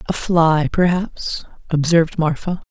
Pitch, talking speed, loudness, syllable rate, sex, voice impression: 165 Hz, 110 wpm, -18 LUFS, 4.1 syllables/s, female, feminine, adult-like, slightly relaxed, soft, raspy, intellectual, friendly, reassuring, elegant, kind, modest